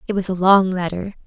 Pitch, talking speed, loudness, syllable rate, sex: 190 Hz, 235 wpm, -18 LUFS, 5.9 syllables/s, female